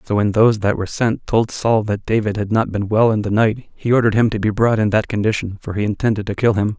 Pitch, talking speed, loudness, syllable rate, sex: 105 Hz, 285 wpm, -18 LUFS, 6.2 syllables/s, male